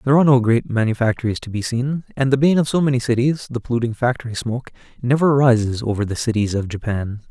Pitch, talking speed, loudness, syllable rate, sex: 120 Hz, 215 wpm, -19 LUFS, 6.6 syllables/s, male